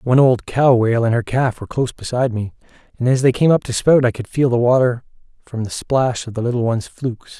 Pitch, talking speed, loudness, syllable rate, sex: 125 Hz, 250 wpm, -17 LUFS, 6.3 syllables/s, male